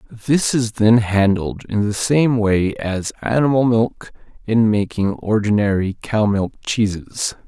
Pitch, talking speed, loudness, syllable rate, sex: 110 Hz, 135 wpm, -18 LUFS, 4.0 syllables/s, male